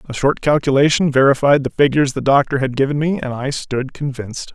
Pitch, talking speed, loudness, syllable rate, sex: 135 Hz, 200 wpm, -16 LUFS, 6.0 syllables/s, male